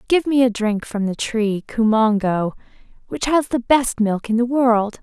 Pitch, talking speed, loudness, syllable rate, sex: 230 Hz, 190 wpm, -19 LUFS, 4.2 syllables/s, female